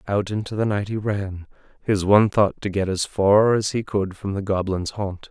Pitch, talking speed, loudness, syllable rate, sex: 100 Hz, 225 wpm, -22 LUFS, 4.8 syllables/s, male